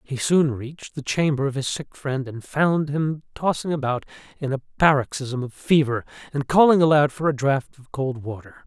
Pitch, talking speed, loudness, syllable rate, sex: 140 Hz, 195 wpm, -22 LUFS, 5.1 syllables/s, male